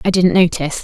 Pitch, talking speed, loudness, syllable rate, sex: 175 Hz, 215 wpm, -14 LUFS, 6.9 syllables/s, female